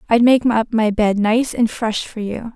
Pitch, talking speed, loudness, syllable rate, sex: 225 Hz, 235 wpm, -17 LUFS, 4.3 syllables/s, female